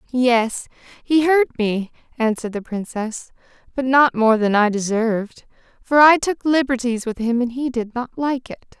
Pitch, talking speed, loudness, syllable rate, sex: 245 Hz, 170 wpm, -19 LUFS, 4.4 syllables/s, female